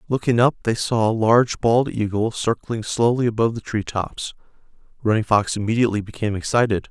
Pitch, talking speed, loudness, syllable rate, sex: 115 Hz, 165 wpm, -20 LUFS, 5.9 syllables/s, male